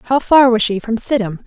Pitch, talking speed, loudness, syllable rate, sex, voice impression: 230 Hz, 245 wpm, -14 LUFS, 4.9 syllables/s, female, very feminine, young, slightly adult-like, very thin, tensed, slightly powerful, very bright, slightly soft, very clear, fluent, very cute, slightly intellectual, refreshing, sincere, calm, friendly, reassuring, very unique, very elegant, very sweet, lively, kind